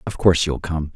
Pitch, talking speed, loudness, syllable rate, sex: 80 Hz, 250 wpm, -20 LUFS, 6.0 syllables/s, male